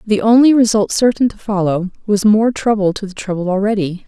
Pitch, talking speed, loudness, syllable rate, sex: 205 Hz, 190 wpm, -15 LUFS, 5.5 syllables/s, female